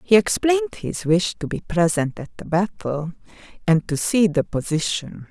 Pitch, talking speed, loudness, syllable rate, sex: 185 Hz, 170 wpm, -21 LUFS, 4.7 syllables/s, female